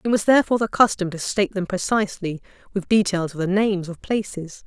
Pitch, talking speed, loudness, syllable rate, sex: 195 Hz, 205 wpm, -21 LUFS, 6.4 syllables/s, female